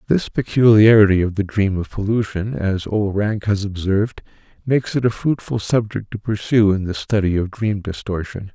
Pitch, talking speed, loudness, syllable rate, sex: 105 Hz, 175 wpm, -18 LUFS, 5.1 syllables/s, male